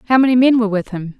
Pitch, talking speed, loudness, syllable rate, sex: 225 Hz, 305 wpm, -14 LUFS, 8.1 syllables/s, female